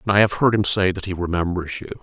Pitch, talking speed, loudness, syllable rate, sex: 95 Hz, 295 wpm, -20 LUFS, 6.7 syllables/s, male